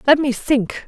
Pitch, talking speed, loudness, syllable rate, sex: 265 Hz, 205 wpm, -18 LUFS, 4.1 syllables/s, female